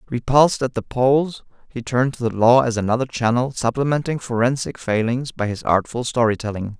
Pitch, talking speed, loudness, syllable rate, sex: 125 Hz, 175 wpm, -20 LUFS, 5.5 syllables/s, male